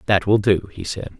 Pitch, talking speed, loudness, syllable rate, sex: 100 Hz, 250 wpm, -20 LUFS, 5.4 syllables/s, male